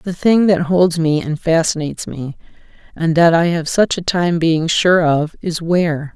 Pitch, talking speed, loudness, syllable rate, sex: 165 Hz, 195 wpm, -15 LUFS, 4.4 syllables/s, female